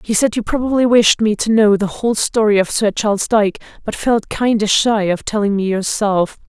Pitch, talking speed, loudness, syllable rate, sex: 215 Hz, 210 wpm, -15 LUFS, 5.3 syllables/s, female